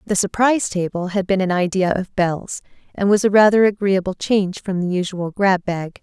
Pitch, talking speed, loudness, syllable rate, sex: 190 Hz, 200 wpm, -18 LUFS, 5.4 syllables/s, female